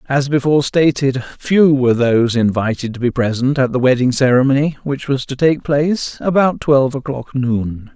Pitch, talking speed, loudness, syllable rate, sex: 135 Hz, 175 wpm, -15 LUFS, 5.1 syllables/s, male